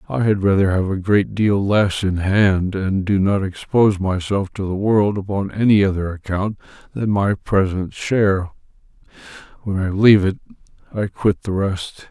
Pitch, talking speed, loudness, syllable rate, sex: 100 Hz, 170 wpm, -18 LUFS, 4.6 syllables/s, male